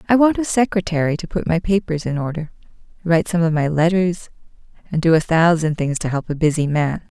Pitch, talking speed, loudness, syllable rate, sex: 165 Hz, 210 wpm, -19 LUFS, 5.9 syllables/s, female